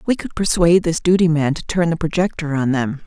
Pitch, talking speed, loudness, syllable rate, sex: 165 Hz, 255 wpm, -18 LUFS, 6.0 syllables/s, female